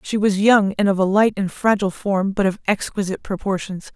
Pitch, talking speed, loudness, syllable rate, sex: 195 Hz, 215 wpm, -19 LUFS, 5.6 syllables/s, female